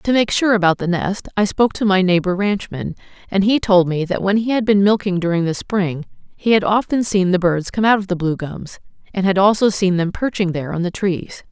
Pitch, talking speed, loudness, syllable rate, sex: 195 Hz, 245 wpm, -17 LUFS, 5.5 syllables/s, female